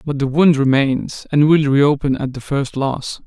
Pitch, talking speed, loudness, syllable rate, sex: 140 Hz, 200 wpm, -16 LUFS, 4.2 syllables/s, male